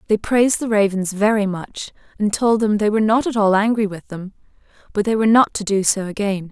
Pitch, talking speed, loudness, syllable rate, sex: 210 Hz, 230 wpm, -18 LUFS, 5.8 syllables/s, female